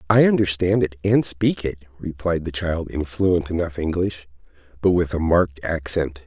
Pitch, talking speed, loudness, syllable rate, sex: 85 Hz, 170 wpm, -21 LUFS, 4.7 syllables/s, male